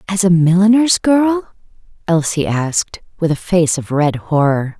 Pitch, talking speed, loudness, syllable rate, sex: 175 Hz, 150 wpm, -15 LUFS, 4.3 syllables/s, female